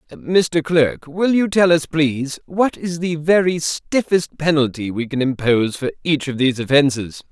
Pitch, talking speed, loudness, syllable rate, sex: 155 Hz, 170 wpm, -18 LUFS, 4.5 syllables/s, male